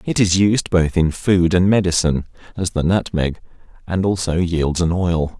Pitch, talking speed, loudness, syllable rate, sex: 90 Hz, 180 wpm, -18 LUFS, 4.6 syllables/s, male